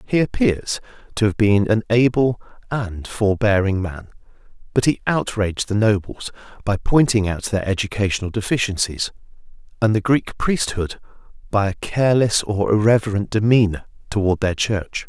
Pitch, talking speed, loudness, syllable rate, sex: 105 Hz, 135 wpm, -20 LUFS, 4.8 syllables/s, male